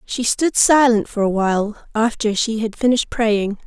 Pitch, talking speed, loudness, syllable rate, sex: 225 Hz, 180 wpm, -18 LUFS, 4.7 syllables/s, female